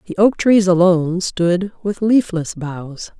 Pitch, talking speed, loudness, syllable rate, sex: 185 Hz, 150 wpm, -16 LUFS, 3.9 syllables/s, female